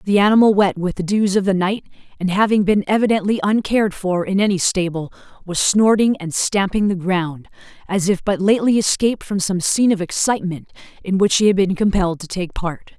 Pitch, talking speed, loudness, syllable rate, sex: 195 Hz, 200 wpm, -18 LUFS, 5.7 syllables/s, female